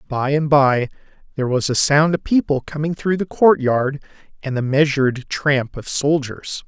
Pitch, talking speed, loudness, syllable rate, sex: 145 Hz, 170 wpm, -18 LUFS, 4.6 syllables/s, male